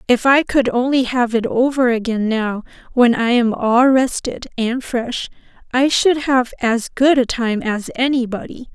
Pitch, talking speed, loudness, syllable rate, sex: 245 Hz, 170 wpm, -17 LUFS, 4.3 syllables/s, female